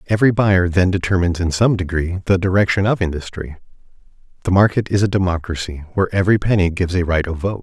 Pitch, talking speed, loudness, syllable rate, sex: 95 Hz, 190 wpm, -17 LUFS, 6.7 syllables/s, male